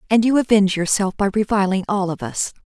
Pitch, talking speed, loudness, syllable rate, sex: 200 Hz, 200 wpm, -19 LUFS, 6.3 syllables/s, female